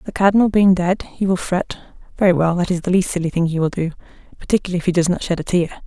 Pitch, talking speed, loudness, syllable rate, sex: 180 Hz, 265 wpm, -18 LUFS, 7.3 syllables/s, female